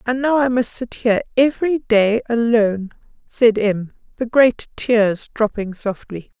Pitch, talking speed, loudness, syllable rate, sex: 230 Hz, 150 wpm, -18 LUFS, 4.4 syllables/s, female